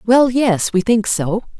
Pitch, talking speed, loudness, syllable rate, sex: 220 Hz, 190 wpm, -16 LUFS, 3.8 syllables/s, female